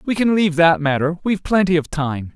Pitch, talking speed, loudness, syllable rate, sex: 170 Hz, 205 wpm, -18 LUFS, 6.0 syllables/s, male